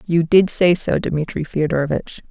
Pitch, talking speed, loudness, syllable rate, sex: 165 Hz, 155 wpm, -18 LUFS, 4.6 syllables/s, female